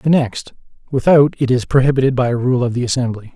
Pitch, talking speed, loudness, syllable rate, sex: 130 Hz, 215 wpm, -16 LUFS, 6.2 syllables/s, male